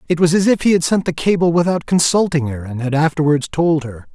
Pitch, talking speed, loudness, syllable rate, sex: 160 Hz, 245 wpm, -16 LUFS, 5.9 syllables/s, male